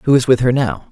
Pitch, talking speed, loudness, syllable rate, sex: 120 Hz, 330 wpm, -14 LUFS, 5.8 syllables/s, male